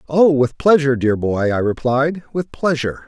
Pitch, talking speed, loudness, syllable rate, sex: 135 Hz, 175 wpm, -17 LUFS, 5.0 syllables/s, male